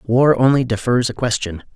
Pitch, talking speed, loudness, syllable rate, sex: 120 Hz, 170 wpm, -17 LUFS, 4.9 syllables/s, male